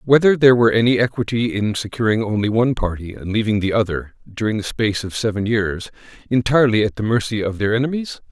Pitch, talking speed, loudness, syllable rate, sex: 110 Hz, 195 wpm, -18 LUFS, 6.4 syllables/s, male